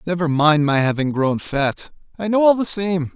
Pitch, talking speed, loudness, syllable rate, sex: 165 Hz, 210 wpm, -18 LUFS, 4.7 syllables/s, male